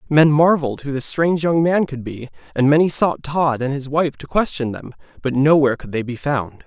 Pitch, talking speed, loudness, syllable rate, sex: 145 Hz, 225 wpm, -18 LUFS, 5.4 syllables/s, male